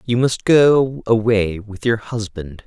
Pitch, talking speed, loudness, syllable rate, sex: 110 Hz, 160 wpm, -17 LUFS, 3.6 syllables/s, male